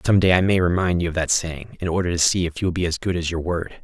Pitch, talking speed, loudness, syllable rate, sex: 85 Hz, 345 wpm, -21 LUFS, 6.6 syllables/s, male